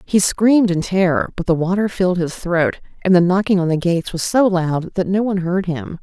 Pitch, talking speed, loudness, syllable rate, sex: 185 Hz, 240 wpm, -17 LUFS, 5.5 syllables/s, female